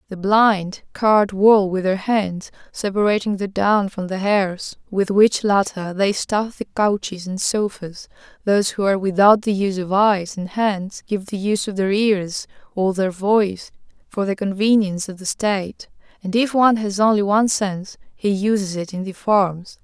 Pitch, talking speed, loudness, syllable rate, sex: 200 Hz, 180 wpm, -19 LUFS, 4.6 syllables/s, female